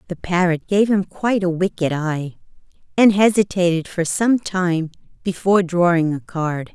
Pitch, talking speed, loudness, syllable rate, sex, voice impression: 180 Hz, 150 wpm, -19 LUFS, 4.7 syllables/s, female, very feminine, slightly gender-neutral, very adult-like, middle-aged, very thin, very tensed, powerful, very bright, soft, very clear, fluent, nasal, cute, slightly intellectual, refreshing, sincere, very calm, friendly, slightly reassuring, very unique, very elegant, wild, sweet, very lively, slightly intense, sharp, light